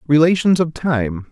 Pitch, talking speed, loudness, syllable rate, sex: 150 Hz, 135 wpm, -16 LUFS, 4.4 syllables/s, male